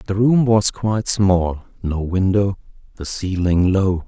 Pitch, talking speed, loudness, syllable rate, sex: 95 Hz, 145 wpm, -18 LUFS, 3.8 syllables/s, male